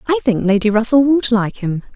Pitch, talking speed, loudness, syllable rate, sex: 235 Hz, 215 wpm, -15 LUFS, 5.6 syllables/s, female